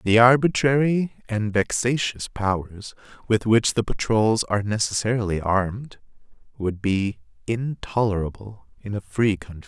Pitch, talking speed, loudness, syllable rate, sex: 110 Hz, 120 wpm, -22 LUFS, 4.5 syllables/s, male